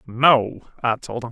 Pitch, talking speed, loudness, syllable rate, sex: 120 Hz, 180 wpm, -20 LUFS, 4.3 syllables/s, male